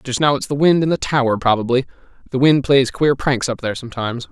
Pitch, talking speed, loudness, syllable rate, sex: 130 Hz, 235 wpm, -17 LUFS, 6.4 syllables/s, male